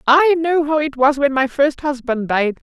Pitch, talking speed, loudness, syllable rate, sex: 280 Hz, 220 wpm, -17 LUFS, 4.4 syllables/s, female